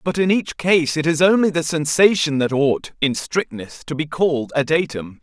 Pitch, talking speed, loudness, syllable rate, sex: 155 Hz, 205 wpm, -18 LUFS, 4.8 syllables/s, male